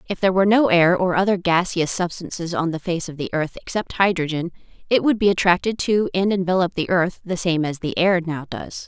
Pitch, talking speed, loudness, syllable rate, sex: 180 Hz, 225 wpm, -20 LUFS, 5.7 syllables/s, female